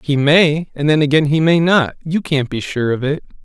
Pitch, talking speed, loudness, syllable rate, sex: 150 Hz, 245 wpm, -15 LUFS, 5.0 syllables/s, male